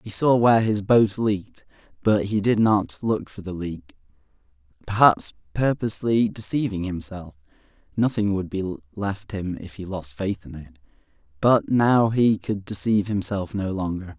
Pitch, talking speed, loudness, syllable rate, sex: 100 Hz, 155 wpm, -23 LUFS, 4.1 syllables/s, male